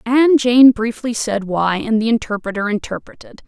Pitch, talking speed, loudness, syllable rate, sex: 225 Hz, 155 wpm, -16 LUFS, 4.8 syllables/s, female